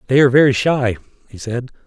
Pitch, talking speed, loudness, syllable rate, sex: 125 Hz, 195 wpm, -16 LUFS, 6.7 syllables/s, male